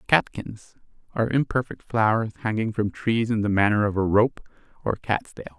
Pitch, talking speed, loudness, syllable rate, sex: 110 Hz, 170 wpm, -24 LUFS, 5.2 syllables/s, male